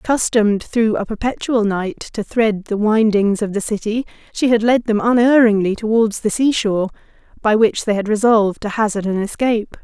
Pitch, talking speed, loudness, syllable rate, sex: 215 Hz, 185 wpm, -17 LUFS, 5.3 syllables/s, female